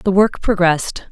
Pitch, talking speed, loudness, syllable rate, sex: 185 Hz, 160 wpm, -16 LUFS, 4.7 syllables/s, female